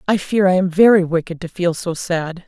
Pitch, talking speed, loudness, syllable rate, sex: 180 Hz, 240 wpm, -17 LUFS, 5.2 syllables/s, female